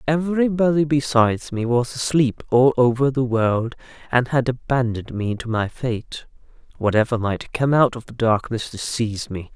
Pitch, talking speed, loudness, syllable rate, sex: 125 Hz, 165 wpm, -21 LUFS, 4.8 syllables/s, male